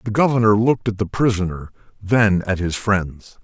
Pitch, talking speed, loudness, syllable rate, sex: 105 Hz, 175 wpm, -19 LUFS, 5.0 syllables/s, male